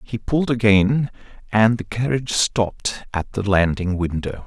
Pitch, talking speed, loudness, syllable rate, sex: 110 Hz, 150 wpm, -20 LUFS, 4.6 syllables/s, male